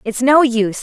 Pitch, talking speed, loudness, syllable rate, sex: 245 Hz, 220 wpm, -13 LUFS, 5.1 syllables/s, female